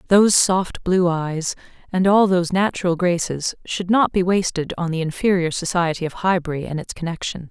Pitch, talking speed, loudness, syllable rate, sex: 175 Hz, 175 wpm, -20 LUFS, 5.2 syllables/s, female